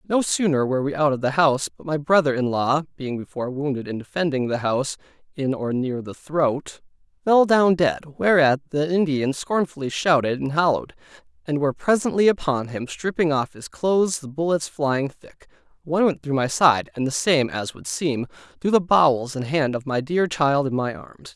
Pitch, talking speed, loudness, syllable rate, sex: 145 Hz, 200 wpm, -22 LUFS, 4.4 syllables/s, male